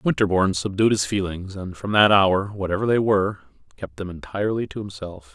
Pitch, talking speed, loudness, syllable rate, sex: 95 Hz, 180 wpm, -22 LUFS, 5.7 syllables/s, male